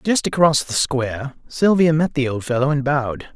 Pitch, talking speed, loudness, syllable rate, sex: 145 Hz, 195 wpm, -19 LUFS, 5.2 syllables/s, male